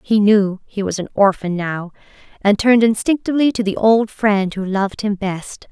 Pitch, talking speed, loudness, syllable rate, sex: 205 Hz, 190 wpm, -17 LUFS, 4.9 syllables/s, female